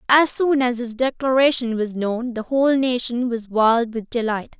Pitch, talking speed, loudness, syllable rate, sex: 245 Hz, 185 wpm, -20 LUFS, 4.6 syllables/s, female